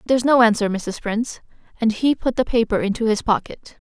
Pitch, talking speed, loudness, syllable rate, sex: 230 Hz, 200 wpm, -20 LUFS, 5.9 syllables/s, female